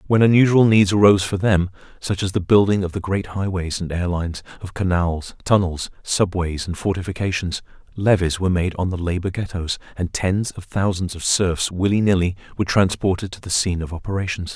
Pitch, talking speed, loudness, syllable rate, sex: 95 Hz, 185 wpm, -20 LUFS, 5.6 syllables/s, male